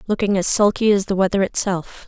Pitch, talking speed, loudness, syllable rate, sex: 195 Hz, 200 wpm, -18 LUFS, 5.8 syllables/s, female